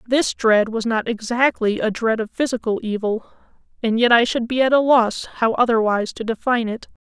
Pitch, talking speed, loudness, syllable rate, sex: 230 Hz, 185 wpm, -19 LUFS, 5.4 syllables/s, female